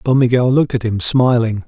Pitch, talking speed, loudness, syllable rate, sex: 120 Hz, 215 wpm, -14 LUFS, 5.7 syllables/s, male